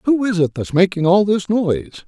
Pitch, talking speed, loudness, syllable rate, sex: 185 Hz, 230 wpm, -17 LUFS, 5.6 syllables/s, male